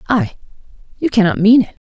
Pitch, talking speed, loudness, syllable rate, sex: 220 Hz, 130 wpm, -14 LUFS, 6.3 syllables/s, female